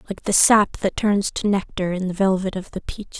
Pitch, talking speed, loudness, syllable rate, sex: 195 Hz, 245 wpm, -20 LUFS, 5.0 syllables/s, female